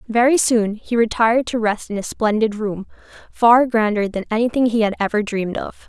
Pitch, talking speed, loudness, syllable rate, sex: 225 Hz, 195 wpm, -18 LUFS, 5.4 syllables/s, female